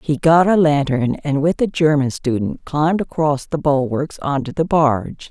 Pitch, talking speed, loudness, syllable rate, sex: 150 Hz, 190 wpm, -17 LUFS, 4.6 syllables/s, female